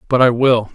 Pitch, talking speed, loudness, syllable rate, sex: 120 Hz, 240 wpm, -14 LUFS, 5.6 syllables/s, male